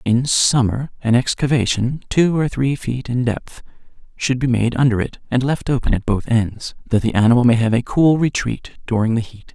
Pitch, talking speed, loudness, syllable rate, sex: 125 Hz, 200 wpm, -18 LUFS, 5.0 syllables/s, male